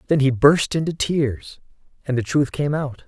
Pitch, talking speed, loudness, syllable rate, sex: 140 Hz, 195 wpm, -20 LUFS, 4.5 syllables/s, male